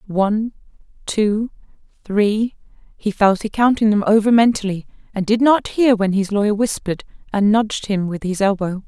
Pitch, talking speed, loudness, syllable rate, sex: 210 Hz, 155 wpm, -18 LUFS, 5.0 syllables/s, female